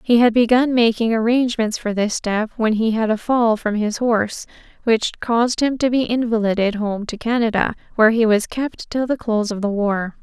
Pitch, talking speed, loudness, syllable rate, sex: 225 Hz, 205 wpm, -19 LUFS, 5.3 syllables/s, female